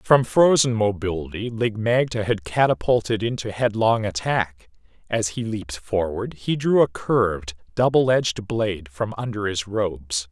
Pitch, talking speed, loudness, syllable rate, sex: 110 Hz, 145 wpm, -22 LUFS, 4.6 syllables/s, male